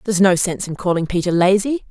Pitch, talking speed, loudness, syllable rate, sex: 190 Hz, 220 wpm, -17 LUFS, 6.8 syllables/s, female